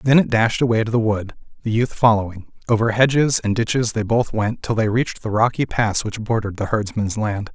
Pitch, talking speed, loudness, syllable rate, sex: 110 Hz, 225 wpm, -19 LUFS, 5.6 syllables/s, male